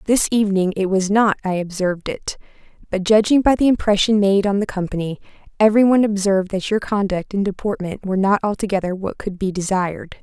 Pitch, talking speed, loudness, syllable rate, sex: 200 Hz, 180 wpm, -19 LUFS, 6.1 syllables/s, female